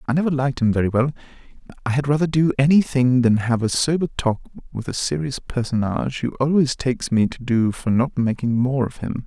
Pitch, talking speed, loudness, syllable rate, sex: 130 Hz, 215 wpm, -20 LUFS, 5.7 syllables/s, male